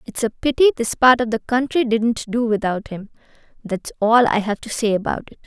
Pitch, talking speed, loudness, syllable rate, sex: 230 Hz, 220 wpm, -19 LUFS, 5.4 syllables/s, female